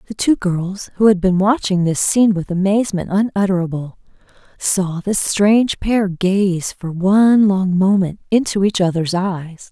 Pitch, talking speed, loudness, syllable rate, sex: 190 Hz, 155 wpm, -16 LUFS, 4.5 syllables/s, female